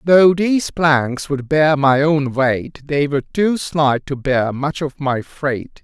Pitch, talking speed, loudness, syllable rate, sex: 145 Hz, 185 wpm, -17 LUFS, 3.5 syllables/s, male